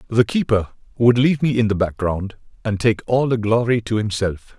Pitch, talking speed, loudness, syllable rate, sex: 115 Hz, 195 wpm, -19 LUFS, 5.2 syllables/s, male